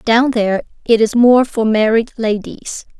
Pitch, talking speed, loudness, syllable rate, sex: 225 Hz, 160 wpm, -14 LUFS, 4.3 syllables/s, female